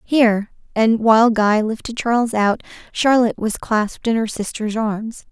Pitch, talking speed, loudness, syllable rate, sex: 225 Hz, 160 wpm, -18 LUFS, 4.7 syllables/s, female